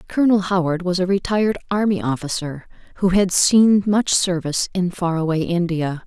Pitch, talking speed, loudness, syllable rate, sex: 180 Hz, 160 wpm, -19 LUFS, 5.2 syllables/s, female